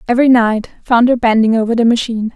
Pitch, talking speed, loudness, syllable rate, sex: 235 Hz, 205 wpm, -13 LUFS, 6.8 syllables/s, female